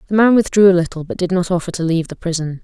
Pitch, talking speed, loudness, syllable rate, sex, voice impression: 180 Hz, 295 wpm, -16 LUFS, 7.4 syllables/s, female, very feminine, adult-like, slightly thin, tensed, slightly powerful, dark, hard, very clear, very fluent, slightly raspy, very cool, very intellectual, very refreshing, sincere, calm, very friendly, very reassuring, unique, very elegant, wild, sweet, slightly lively, slightly strict, slightly sharp